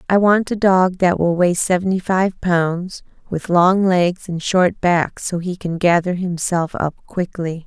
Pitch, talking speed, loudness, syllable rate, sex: 180 Hz, 180 wpm, -18 LUFS, 3.9 syllables/s, female